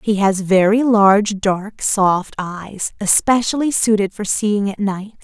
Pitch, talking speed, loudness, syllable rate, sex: 205 Hz, 150 wpm, -16 LUFS, 3.9 syllables/s, female